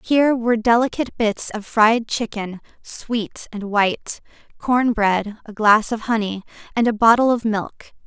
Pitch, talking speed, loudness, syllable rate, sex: 225 Hz, 155 wpm, -19 LUFS, 4.4 syllables/s, female